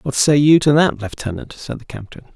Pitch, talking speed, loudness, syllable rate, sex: 135 Hz, 230 wpm, -15 LUFS, 5.7 syllables/s, male